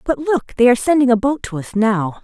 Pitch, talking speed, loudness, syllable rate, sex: 245 Hz, 270 wpm, -16 LUFS, 6.2 syllables/s, female